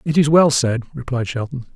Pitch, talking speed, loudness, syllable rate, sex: 130 Hz, 205 wpm, -18 LUFS, 5.4 syllables/s, male